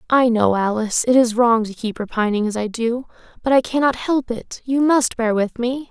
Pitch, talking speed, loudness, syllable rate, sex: 235 Hz, 225 wpm, -19 LUFS, 5.1 syllables/s, female